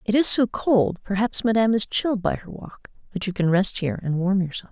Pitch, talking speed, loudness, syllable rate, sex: 200 Hz, 240 wpm, -21 LUFS, 5.8 syllables/s, female